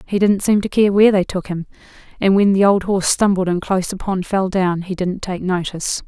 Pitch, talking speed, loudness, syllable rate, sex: 190 Hz, 235 wpm, -17 LUFS, 5.8 syllables/s, female